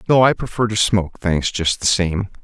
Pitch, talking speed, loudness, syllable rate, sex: 100 Hz, 220 wpm, -18 LUFS, 5.3 syllables/s, male